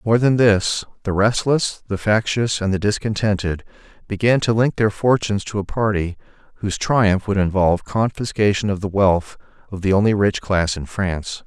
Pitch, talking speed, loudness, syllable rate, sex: 100 Hz, 175 wpm, -19 LUFS, 5.1 syllables/s, male